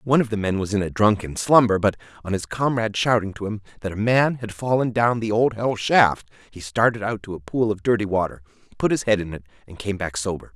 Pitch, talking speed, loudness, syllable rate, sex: 105 Hz, 250 wpm, -22 LUFS, 5.9 syllables/s, male